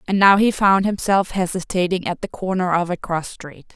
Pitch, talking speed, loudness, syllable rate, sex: 185 Hz, 210 wpm, -19 LUFS, 5.0 syllables/s, female